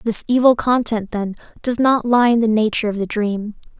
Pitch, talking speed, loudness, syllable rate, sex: 225 Hz, 205 wpm, -17 LUFS, 5.4 syllables/s, female